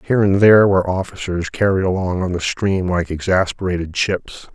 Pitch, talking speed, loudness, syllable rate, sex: 95 Hz, 170 wpm, -17 LUFS, 5.5 syllables/s, male